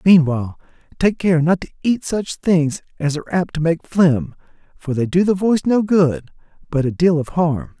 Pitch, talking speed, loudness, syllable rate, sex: 165 Hz, 200 wpm, -18 LUFS, 5.0 syllables/s, male